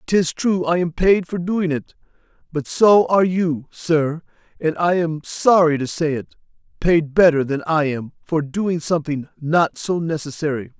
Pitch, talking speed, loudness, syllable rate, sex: 160 Hz, 170 wpm, -19 LUFS, 4.4 syllables/s, male